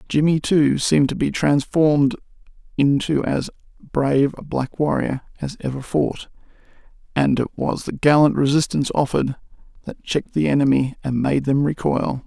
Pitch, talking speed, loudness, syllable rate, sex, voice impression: 145 Hz, 145 wpm, -20 LUFS, 5.0 syllables/s, male, masculine, middle-aged, relaxed, weak, dark, muffled, halting, raspy, calm, slightly friendly, slightly wild, kind, modest